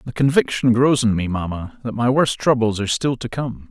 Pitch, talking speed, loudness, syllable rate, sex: 120 Hz, 225 wpm, -19 LUFS, 5.4 syllables/s, male